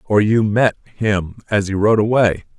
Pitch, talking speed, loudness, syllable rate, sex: 105 Hz, 160 wpm, -17 LUFS, 4.5 syllables/s, male